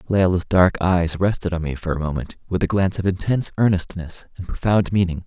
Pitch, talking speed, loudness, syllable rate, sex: 90 Hz, 205 wpm, -21 LUFS, 5.9 syllables/s, male